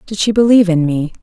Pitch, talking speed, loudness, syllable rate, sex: 190 Hz, 245 wpm, -13 LUFS, 6.8 syllables/s, female